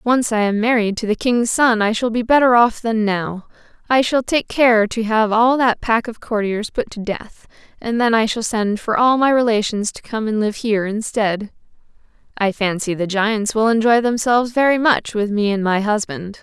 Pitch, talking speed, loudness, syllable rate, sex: 225 Hz, 210 wpm, -17 LUFS, 4.8 syllables/s, female